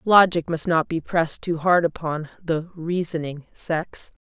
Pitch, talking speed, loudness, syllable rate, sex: 165 Hz, 155 wpm, -23 LUFS, 4.2 syllables/s, female